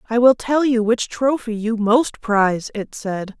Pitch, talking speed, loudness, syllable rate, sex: 225 Hz, 195 wpm, -19 LUFS, 4.1 syllables/s, female